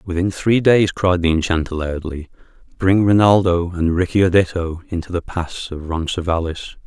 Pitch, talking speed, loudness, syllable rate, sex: 90 Hz, 150 wpm, -18 LUFS, 4.9 syllables/s, male